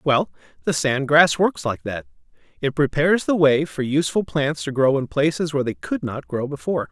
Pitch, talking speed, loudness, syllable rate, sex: 145 Hz, 210 wpm, -21 LUFS, 5.4 syllables/s, male